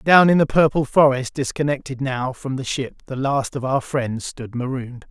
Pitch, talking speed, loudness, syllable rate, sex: 135 Hz, 200 wpm, -20 LUFS, 4.9 syllables/s, male